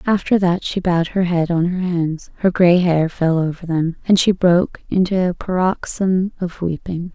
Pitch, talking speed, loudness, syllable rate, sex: 175 Hz, 195 wpm, -18 LUFS, 4.6 syllables/s, female